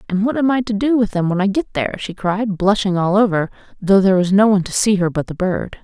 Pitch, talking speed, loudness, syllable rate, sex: 200 Hz, 290 wpm, -17 LUFS, 6.2 syllables/s, female